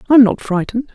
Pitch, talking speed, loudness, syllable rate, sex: 235 Hz, 190 wpm, -15 LUFS, 6.9 syllables/s, female